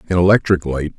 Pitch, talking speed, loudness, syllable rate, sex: 85 Hz, 185 wpm, -16 LUFS, 6.4 syllables/s, male